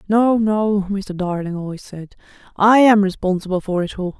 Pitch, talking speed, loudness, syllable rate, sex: 195 Hz, 170 wpm, -17 LUFS, 4.7 syllables/s, female